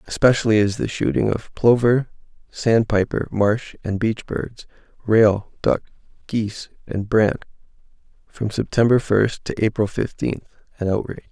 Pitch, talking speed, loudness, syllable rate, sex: 110 Hz, 125 wpm, -20 LUFS, 4.6 syllables/s, male